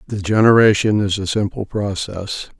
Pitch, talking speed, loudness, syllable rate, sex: 100 Hz, 140 wpm, -17 LUFS, 4.8 syllables/s, male